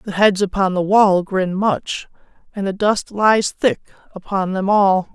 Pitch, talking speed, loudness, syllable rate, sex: 195 Hz, 175 wpm, -17 LUFS, 4.1 syllables/s, female